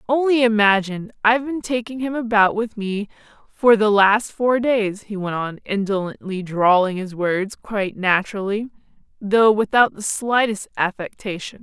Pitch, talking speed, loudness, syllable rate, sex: 210 Hz, 145 wpm, -19 LUFS, 4.7 syllables/s, female